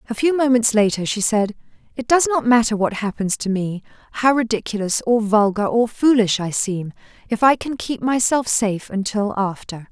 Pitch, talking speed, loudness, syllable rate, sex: 220 Hz, 175 wpm, -19 LUFS, 5.1 syllables/s, female